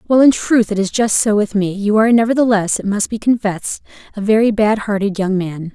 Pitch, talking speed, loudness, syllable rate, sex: 210 Hz, 230 wpm, -15 LUFS, 5.6 syllables/s, female